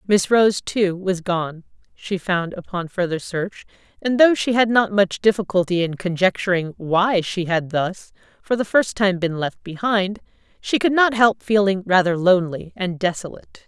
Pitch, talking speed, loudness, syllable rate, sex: 190 Hz, 170 wpm, -20 LUFS, 4.6 syllables/s, female